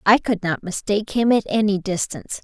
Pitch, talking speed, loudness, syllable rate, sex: 200 Hz, 195 wpm, -21 LUFS, 5.6 syllables/s, female